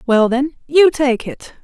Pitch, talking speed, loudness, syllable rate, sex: 270 Hz, 185 wpm, -15 LUFS, 4.0 syllables/s, female